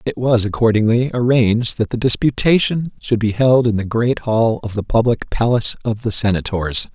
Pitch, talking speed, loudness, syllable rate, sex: 115 Hz, 180 wpm, -17 LUFS, 5.1 syllables/s, male